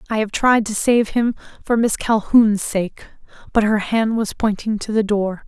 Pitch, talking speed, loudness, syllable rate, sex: 215 Hz, 195 wpm, -18 LUFS, 4.7 syllables/s, female